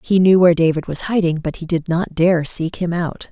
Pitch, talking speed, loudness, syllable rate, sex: 170 Hz, 255 wpm, -17 LUFS, 5.3 syllables/s, female